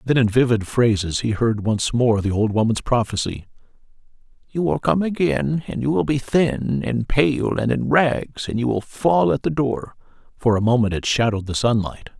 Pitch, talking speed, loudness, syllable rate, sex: 115 Hz, 195 wpm, -20 LUFS, 4.8 syllables/s, male